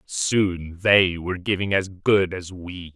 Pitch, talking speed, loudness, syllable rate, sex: 90 Hz, 165 wpm, -21 LUFS, 3.6 syllables/s, male